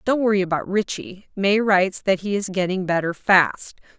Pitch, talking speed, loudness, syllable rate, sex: 190 Hz, 180 wpm, -20 LUFS, 5.0 syllables/s, female